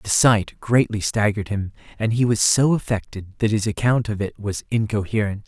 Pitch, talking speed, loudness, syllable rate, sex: 105 Hz, 185 wpm, -21 LUFS, 5.2 syllables/s, male